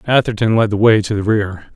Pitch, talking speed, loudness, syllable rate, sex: 105 Hz, 240 wpm, -15 LUFS, 5.6 syllables/s, male